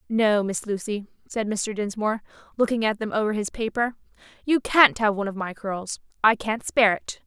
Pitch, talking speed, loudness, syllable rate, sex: 215 Hz, 190 wpm, -24 LUFS, 5.4 syllables/s, female